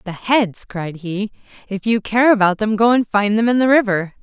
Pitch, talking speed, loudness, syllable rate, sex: 210 Hz, 225 wpm, -17 LUFS, 5.0 syllables/s, female